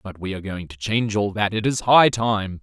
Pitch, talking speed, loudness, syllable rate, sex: 105 Hz, 275 wpm, -20 LUFS, 5.5 syllables/s, male